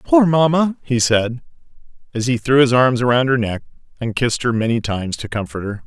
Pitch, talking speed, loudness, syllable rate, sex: 125 Hz, 205 wpm, -17 LUFS, 5.6 syllables/s, male